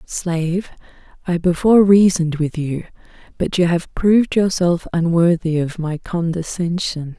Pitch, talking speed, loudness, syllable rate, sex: 175 Hz, 125 wpm, -18 LUFS, 4.6 syllables/s, female